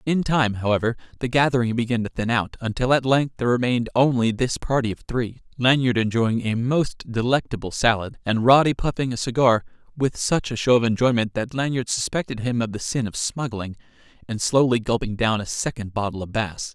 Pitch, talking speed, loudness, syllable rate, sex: 120 Hz, 195 wpm, -22 LUFS, 4.4 syllables/s, male